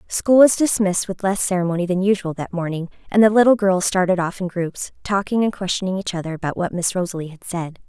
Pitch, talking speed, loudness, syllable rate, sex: 185 Hz, 220 wpm, -19 LUFS, 6.1 syllables/s, female